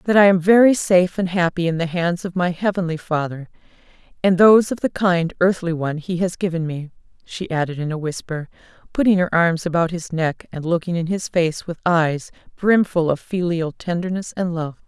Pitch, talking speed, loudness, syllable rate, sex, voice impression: 175 Hz, 195 wpm, -19 LUFS, 5.3 syllables/s, female, very feminine, adult-like, slightly middle-aged, thin, tensed, slightly powerful, bright, slightly soft, clear, fluent, cool, intellectual, refreshing, sincere, slightly calm, slightly friendly, slightly reassuring, unique, slightly elegant, wild, lively, slightly kind, strict, intense